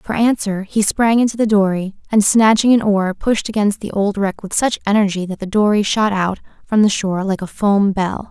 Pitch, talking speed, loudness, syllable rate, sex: 205 Hz, 225 wpm, -16 LUFS, 5.1 syllables/s, female